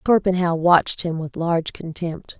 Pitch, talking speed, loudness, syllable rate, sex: 170 Hz, 150 wpm, -21 LUFS, 4.8 syllables/s, female